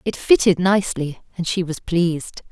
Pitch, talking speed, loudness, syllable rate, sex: 175 Hz, 165 wpm, -19 LUFS, 5.4 syllables/s, female